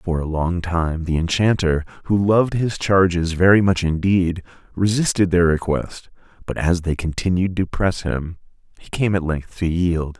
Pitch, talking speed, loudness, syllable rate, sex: 90 Hz, 170 wpm, -19 LUFS, 4.5 syllables/s, male